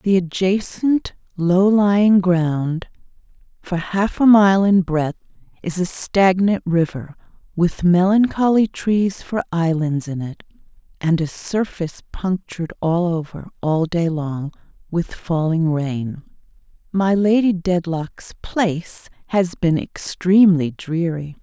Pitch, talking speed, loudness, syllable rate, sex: 175 Hz, 120 wpm, -19 LUFS, 3.7 syllables/s, female